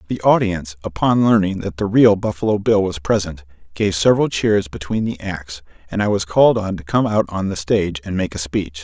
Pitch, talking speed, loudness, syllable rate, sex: 95 Hz, 215 wpm, -18 LUFS, 5.5 syllables/s, male